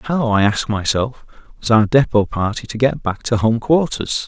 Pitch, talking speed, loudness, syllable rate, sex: 115 Hz, 195 wpm, -17 LUFS, 4.6 syllables/s, male